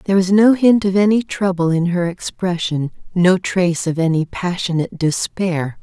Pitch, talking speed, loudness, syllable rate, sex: 180 Hz, 165 wpm, -17 LUFS, 5.0 syllables/s, female